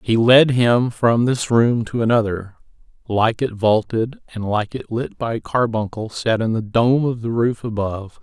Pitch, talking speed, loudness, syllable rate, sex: 115 Hz, 180 wpm, -19 LUFS, 4.4 syllables/s, male